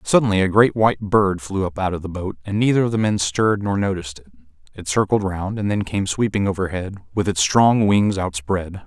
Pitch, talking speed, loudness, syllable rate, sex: 100 Hz, 225 wpm, -20 LUFS, 5.5 syllables/s, male